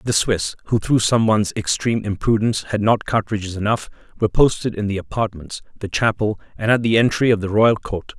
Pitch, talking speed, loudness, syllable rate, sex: 105 Hz, 200 wpm, -19 LUFS, 5.9 syllables/s, male